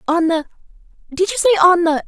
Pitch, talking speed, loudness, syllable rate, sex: 350 Hz, 175 wpm, -15 LUFS, 7.4 syllables/s, female